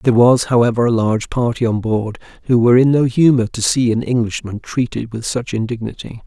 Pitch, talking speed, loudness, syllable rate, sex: 120 Hz, 200 wpm, -16 LUFS, 5.8 syllables/s, male